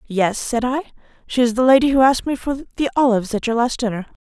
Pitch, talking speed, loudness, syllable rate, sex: 245 Hz, 240 wpm, -18 LUFS, 6.5 syllables/s, female